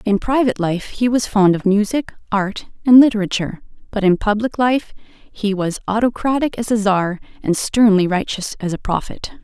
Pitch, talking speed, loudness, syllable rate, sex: 210 Hz, 170 wpm, -17 LUFS, 5.0 syllables/s, female